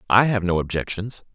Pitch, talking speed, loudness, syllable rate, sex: 100 Hz, 180 wpm, -22 LUFS, 5.5 syllables/s, male